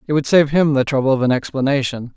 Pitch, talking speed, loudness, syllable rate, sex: 140 Hz, 250 wpm, -17 LUFS, 6.5 syllables/s, male